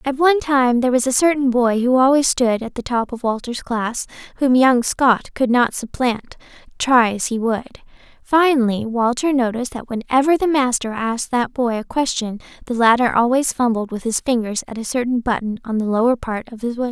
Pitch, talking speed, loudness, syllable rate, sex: 245 Hz, 200 wpm, -18 LUFS, 5.4 syllables/s, female